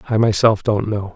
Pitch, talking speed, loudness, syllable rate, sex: 105 Hz, 210 wpm, -17 LUFS, 5.2 syllables/s, male